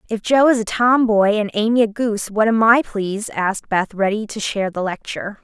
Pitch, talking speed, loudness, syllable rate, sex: 215 Hz, 220 wpm, -18 LUFS, 5.6 syllables/s, female